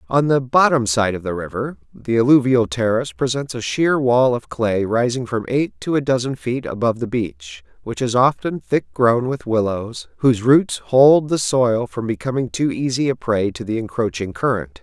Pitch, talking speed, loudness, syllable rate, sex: 120 Hz, 195 wpm, -19 LUFS, 4.8 syllables/s, male